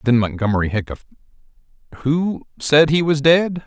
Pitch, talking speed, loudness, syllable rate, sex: 140 Hz, 115 wpm, -18 LUFS, 5.3 syllables/s, male